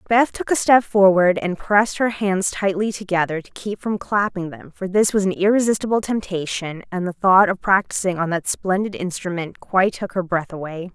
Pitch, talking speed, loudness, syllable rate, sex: 190 Hz, 195 wpm, -20 LUFS, 5.2 syllables/s, female